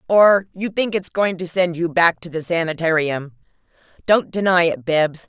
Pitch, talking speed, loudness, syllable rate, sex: 175 Hz, 180 wpm, -18 LUFS, 4.6 syllables/s, female